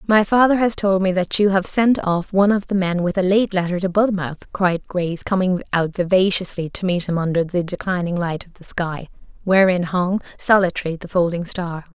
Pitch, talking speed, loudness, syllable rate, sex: 185 Hz, 205 wpm, -19 LUFS, 5.2 syllables/s, female